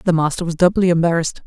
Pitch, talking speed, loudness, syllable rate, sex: 170 Hz, 205 wpm, -17 LUFS, 7.1 syllables/s, female